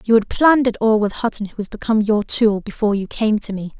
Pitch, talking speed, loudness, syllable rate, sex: 215 Hz, 270 wpm, -18 LUFS, 6.3 syllables/s, female